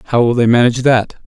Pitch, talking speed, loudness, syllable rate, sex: 120 Hz, 235 wpm, -13 LUFS, 5.8 syllables/s, male